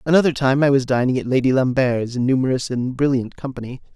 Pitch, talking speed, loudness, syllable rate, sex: 130 Hz, 195 wpm, -19 LUFS, 6.2 syllables/s, male